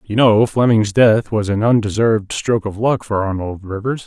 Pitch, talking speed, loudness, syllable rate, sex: 110 Hz, 190 wpm, -16 LUFS, 5.0 syllables/s, male